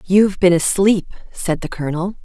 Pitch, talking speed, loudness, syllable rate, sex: 180 Hz, 160 wpm, -17 LUFS, 5.4 syllables/s, female